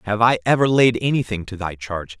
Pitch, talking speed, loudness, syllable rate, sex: 110 Hz, 220 wpm, -19 LUFS, 6.0 syllables/s, male